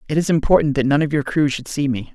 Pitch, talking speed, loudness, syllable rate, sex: 145 Hz, 310 wpm, -18 LUFS, 6.7 syllables/s, male